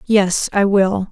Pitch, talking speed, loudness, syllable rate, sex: 195 Hz, 160 wpm, -16 LUFS, 3.2 syllables/s, female